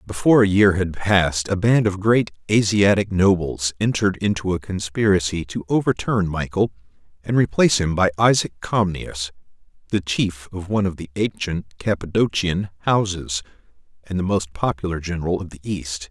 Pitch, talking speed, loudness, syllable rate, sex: 95 Hz, 155 wpm, -20 LUFS, 5.3 syllables/s, male